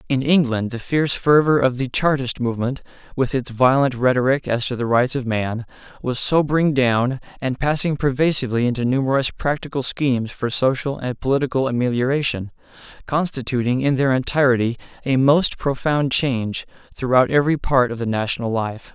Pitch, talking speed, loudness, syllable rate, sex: 130 Hz, 155 wpm, -20 LUFS, 5.5 syllables/s, male